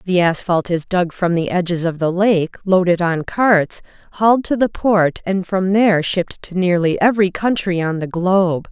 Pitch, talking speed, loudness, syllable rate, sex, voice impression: 185 Hz, 195 wpm, -17 LUFS, 4.8 syllables/s, female, feminine, middle-aged, tensed, powerful, clear, fluent, intellectual, calm, friendly, slightly reassuring, elegant, lively, slightly strict